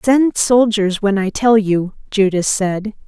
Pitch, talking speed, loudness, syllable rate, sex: 210 Hz, 155 wpm, -15 LUFS, 3.7 syllables/s, female